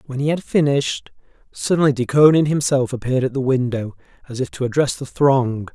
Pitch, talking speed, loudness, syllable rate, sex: 130 Hz, 180 wpm, -19 LUFS, 5.8 syllables/s, male